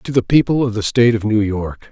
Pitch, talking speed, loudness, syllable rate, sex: 115 Hz, 280 wpm, -16 LUFS, 6.0 syllables/s, male